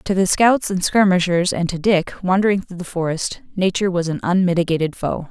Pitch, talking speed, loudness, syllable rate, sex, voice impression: 180 Hz, 190 wpm, -18 LUFS, 5.6 syllables/s, female, very feminine, adult-like, slightly thin, slightly tensed, powerful, slightly dark, slightly soft, clear, fluent, slightly raspy, slightly cute, cool, intellectual, slightly refreshing, sincere, slightly calm, friendly, reassuring, unique, slightly elegant, wild, sweet, lively, slightly strict, intense